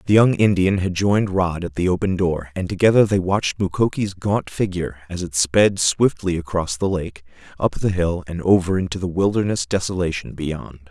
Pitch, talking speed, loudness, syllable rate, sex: 90 Hz, 185 wpm, -20 LUFS, 5.2 syllables/s, male